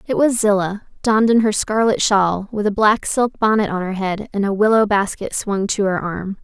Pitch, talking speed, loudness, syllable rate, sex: 205 Hz, 225 wpm, -18 LUFS, 5.0 syllables/s, female